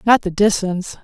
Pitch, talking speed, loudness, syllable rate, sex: 195 Hz, 175 wpm, -17 LUFS, 4.6 syllables/s, female